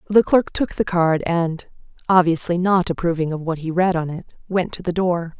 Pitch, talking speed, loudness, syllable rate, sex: 175 Hz, 210 wpm, -20 LUFS, 4.9 syllables/s, female